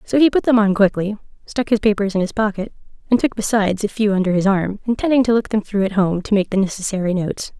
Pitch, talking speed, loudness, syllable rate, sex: 205 Hz, 255 wpm, -18 LUFS, 6.5 syllables/s, female